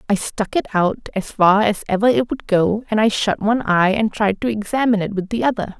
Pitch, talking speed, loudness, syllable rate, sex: 210 Hz, 250 wpm, -18 LUFS, 5.6 syllables/s, female